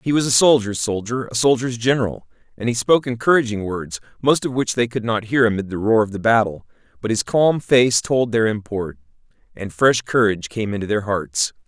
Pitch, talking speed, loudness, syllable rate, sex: 115 Hz, 205 wpm, -19 LUFS, 5.5 syllables/s, male